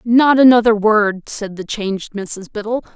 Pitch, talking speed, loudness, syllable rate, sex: 215 Hz, 160 wpm, -16 LUFS, 4.3 syllables/s, female